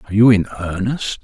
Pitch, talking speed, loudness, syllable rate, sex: 105 Hz, 195 wpm, -17 LUFS, 5.8 syllables/s, male